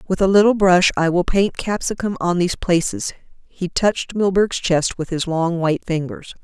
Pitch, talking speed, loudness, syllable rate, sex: 180 Hz, 185 wpm, -18 LUFS, 5.1 syllables/s, female